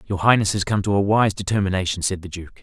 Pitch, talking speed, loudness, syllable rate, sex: 100 Hz, 250 wpm, -20 LUFS, 6.4 syllables/s, male